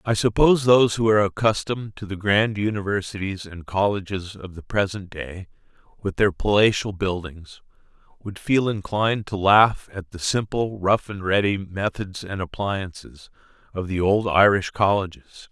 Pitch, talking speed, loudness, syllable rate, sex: 100 Hz, 150 wpm, -22 LUFS, 4.8 syllables/s, male